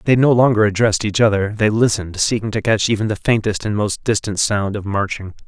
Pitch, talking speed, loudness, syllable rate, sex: 105 Hz, 220 wpm, -17 LUFS, 5.9 syllables/s, male